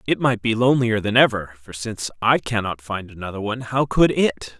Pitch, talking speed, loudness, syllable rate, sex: 110 Hz, 210 wpm, -21 LUFS, 5.6 syllables/s, male